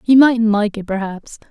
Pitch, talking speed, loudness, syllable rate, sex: 220 Hz, 200 wpm, -16 LUFS, 4.6 syllables/s, female